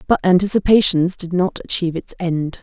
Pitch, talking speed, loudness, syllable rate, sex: 180 Hz, 160 wpm, -17 LUFS, 5.6 syllables/s, female